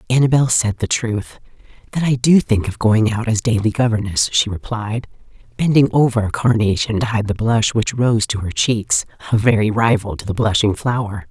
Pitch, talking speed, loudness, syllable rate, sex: 110 Hz, 185 wpm, -17 LUFS, 5.1 syllables/s, female